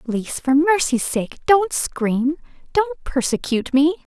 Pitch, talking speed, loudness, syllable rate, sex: 290 Hz, 130 wpm, -20 LUFS, 3.7 syllables/s, female